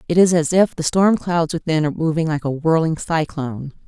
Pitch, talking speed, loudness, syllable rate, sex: 160 Hz, 215 wpm, -18 LUFS, 5.6 syllables/s, female